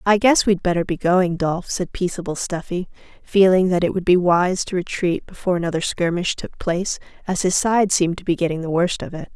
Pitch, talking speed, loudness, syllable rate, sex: 180 Hz, 220 wpm, -20 LUFS, 5.6 syllables/s, female